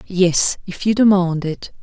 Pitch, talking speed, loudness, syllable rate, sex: 185 Hz, 165 wpm, -17 LUFS, 3.9 syllables/s, female